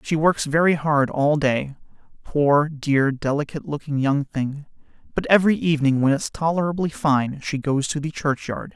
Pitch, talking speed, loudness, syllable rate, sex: 150 Hz, 160 wpm, -21 LUFS, 4.9 syllables/s, male